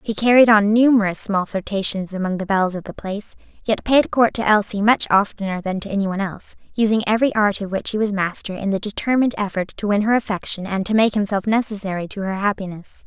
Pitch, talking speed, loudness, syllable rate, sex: 205 Hz, 220 wpm, -19 LUFS, 6.3 syllables/s, female